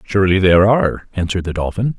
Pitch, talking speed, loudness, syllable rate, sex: 95 Hz, 180 wpm, -16 LUFS, 7.1 syllables/s, male